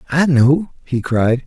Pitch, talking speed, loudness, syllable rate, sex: 140 Hz, 165 wpm, -16 LUFS, 3.6 syllables/s, male